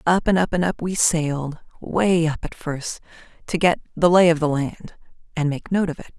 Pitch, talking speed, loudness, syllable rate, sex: 165 Hz, 225 wpm, -21 LUFS, 5.0 syllables/s, female